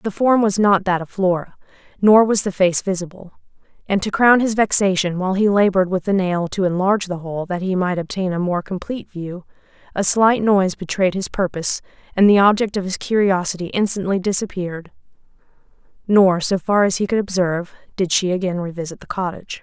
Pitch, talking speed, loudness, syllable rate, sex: 190 Hz, 190 wpm, -18 LUFS, 5.8 syllables/s, female